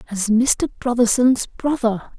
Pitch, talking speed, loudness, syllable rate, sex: 235 Hz, 110 wpm, -18 LUFS, 4.1 syllables/s, female